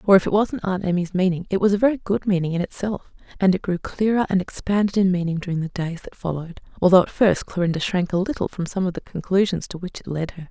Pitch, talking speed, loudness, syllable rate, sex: 185 Hz, 255 wpm, -22 LUFS, 6.4 syllables/s, female